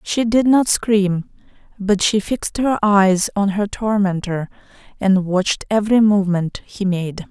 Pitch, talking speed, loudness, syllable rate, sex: 200 Hz, 150 wpm, -18 LUFS, 4.3 syllables/s, female